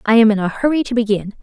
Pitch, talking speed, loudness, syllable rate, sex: 225 Hz, 295 wpm, -16 LUFS, 7.1 syllables/s, female